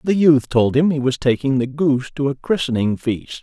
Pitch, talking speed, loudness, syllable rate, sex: 140 Hz, 230 wpm, -18 LUFS, 5.2 syllables/s, male